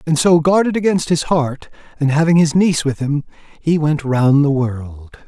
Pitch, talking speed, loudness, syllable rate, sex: 150 Hz, 195 wpm, -16 LUFS, 4.8 syllables/s, male